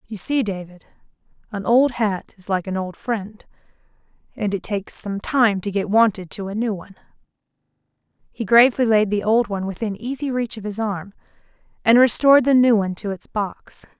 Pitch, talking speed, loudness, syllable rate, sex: 215 Hz, 185 wpm, -20 LUFS, 5.3 syllables/s, female